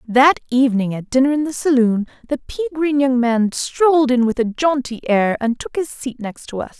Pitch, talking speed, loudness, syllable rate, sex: 260 Hz, 220 wpm, -18 LUFS, 5.0 syllables/s, female